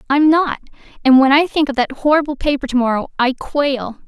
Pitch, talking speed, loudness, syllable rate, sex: 275 Hz, 175 wpm, -16 LUFS, 5.5 syllables/s, female